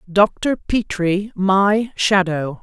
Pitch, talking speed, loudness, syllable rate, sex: 195 Hz, 70 wpm, -18 LUFS, 2.5 syllables/s, female